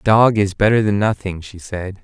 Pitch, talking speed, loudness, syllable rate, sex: 100 Hz, 235 wpm, -17 LUFS, 5.1 syllables/s, male